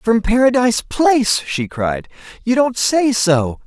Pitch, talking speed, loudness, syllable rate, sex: 210 Hz, 145 wpm, -16 LUFS, 4.0 syllables/s, male